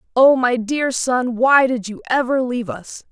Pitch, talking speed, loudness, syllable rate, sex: 250 Hz, 195 wpm, -17 LUFS, 4.5 syllables/s, female